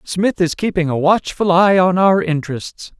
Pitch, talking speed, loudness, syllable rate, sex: 180 Hz, 180 wpm, -16 LUFS, 4.5 syllables/s, male